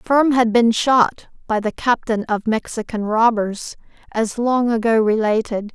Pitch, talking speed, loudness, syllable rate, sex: 225 Hz, 145 wpm, -18 LUFS, 4.1 syllables/s, female